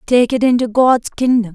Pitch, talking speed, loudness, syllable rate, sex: 235 Hz, 195 wpm, -14 LUFS, 4.9 syllables/s, female